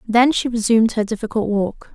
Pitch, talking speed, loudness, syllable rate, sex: 225 Hz, 185 wpm, -18 LUFS, 5.5 syllables/s, female